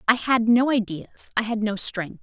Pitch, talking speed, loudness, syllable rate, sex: 225 Hz, 215 wpm, -23 LUFS, 4.5 syllables/s, female